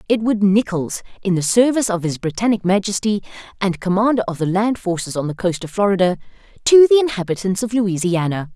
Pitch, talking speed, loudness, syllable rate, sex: 200 Hz, 175 wpm, -18 LUFS, 6.0 syllables/s, female